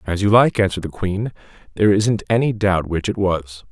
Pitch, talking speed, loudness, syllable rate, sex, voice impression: 100 Hz, 210 wpm, -19 LUFS, 5.6 syllables/s, male, very masculine, very adult-like, very middle-aged, very thick, very tensed, very powerful, bright, soft, slightly muffled, fluent, very cool, very intellectual, slightly refreshing, sincere, very calm, very mature, very friendly, unique, elegant, wild, slightly sweet, lively, very kind